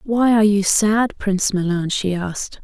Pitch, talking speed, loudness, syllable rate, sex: 200 Hz, 180 wpm, -18 LUFS, 4.7 syllables/s, female